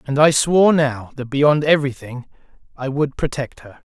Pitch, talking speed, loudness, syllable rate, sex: 140 Hz, 170 wpm, -17 LUFS, 5.1 syllables/s, male